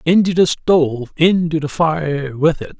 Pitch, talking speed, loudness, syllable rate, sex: 155 Hz, 170 wpm, -16 LUFS, 4.2 syllables/s, male